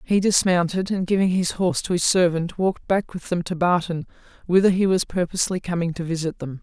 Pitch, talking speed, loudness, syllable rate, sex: 175 Hz, 210 wpm, -22 LUFS, 5.9 syllables/s, female